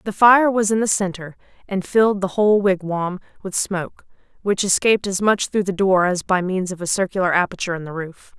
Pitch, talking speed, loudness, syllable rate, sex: 190 Hz, 215 wpm, -19 LUFS, 5.7 syllables/s, female